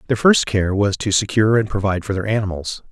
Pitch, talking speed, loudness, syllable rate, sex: 105 Hz, 225 wpm, -18 LUFS, 6.3 syllables/s, male